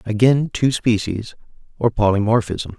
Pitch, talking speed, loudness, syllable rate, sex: 110 Hz, 110 wpm, -19 LUFS, 4.7 syllables/s, male